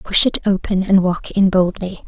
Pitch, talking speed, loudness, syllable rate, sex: 195 Hz, 200 wpm, -16 LUFS, 4.6 syllables/s, female